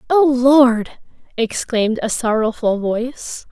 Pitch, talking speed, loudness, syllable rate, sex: 240 Hz, 100 wpm, -17 LUFS, 3.8 syllables/s, female